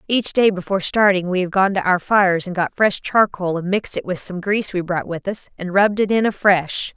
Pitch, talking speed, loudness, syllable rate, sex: 190 Hz, 250 wpm, -18 LUFS, 5.7 syllables/s, female